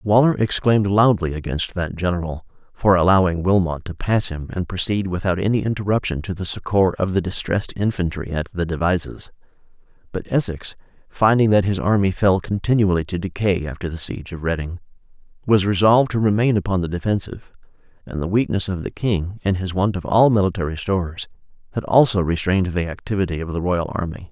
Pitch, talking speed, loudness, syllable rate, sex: 95 Hz, 175 wpm, -20 LUFS, 5.8 syllables/s, male